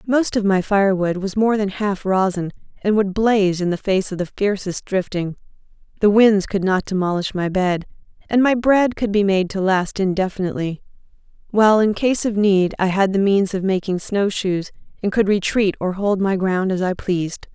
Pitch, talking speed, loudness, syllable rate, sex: 195 Hz, 195 wpm, -19 LUFS, 5.1 syllables/s, female